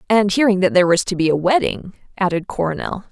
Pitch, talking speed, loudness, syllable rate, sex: 190 Hz, 210 wpm, -17 LUFS, 6.4 syllables/s, female